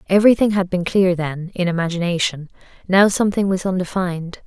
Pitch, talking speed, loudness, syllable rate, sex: 185 Hz, 150 wpm, -18 LUFS, 5.9 syllables/s, female